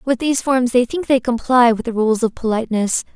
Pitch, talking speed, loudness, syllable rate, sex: 240 Hz, 230 wpm, -17 LUFS, 5.8 syllables/s, female